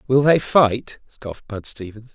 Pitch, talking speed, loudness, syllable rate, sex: 120 Hz, 170 wpm, -19 LUFS, 4.2 syllables/s, male